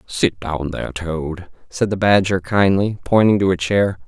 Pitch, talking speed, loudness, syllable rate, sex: 90 Hz, 175 wpm, -18 LUFS, 4.4 syllables/s, male